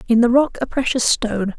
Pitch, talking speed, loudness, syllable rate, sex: 240 Hz, 225 wpm, -18 LUFS, 5.9 syllables/s, female